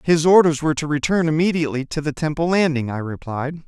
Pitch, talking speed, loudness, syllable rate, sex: 155 Hz, 195 wpm, -19 LUFS, 6.2 syllables/s, male